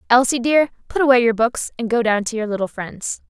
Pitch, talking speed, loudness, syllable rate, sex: 235 Hz, 235 wpm, -19 LUFS, 5.7 syllables/s, female